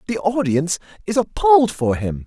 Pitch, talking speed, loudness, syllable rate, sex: 165 Hz, 160 wpm, -19 LUFS, 5.5 syllables/s, male